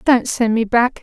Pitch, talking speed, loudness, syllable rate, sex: 235 Hz, 235 wpm, -16 LUFS, 4.3 syllables/s, female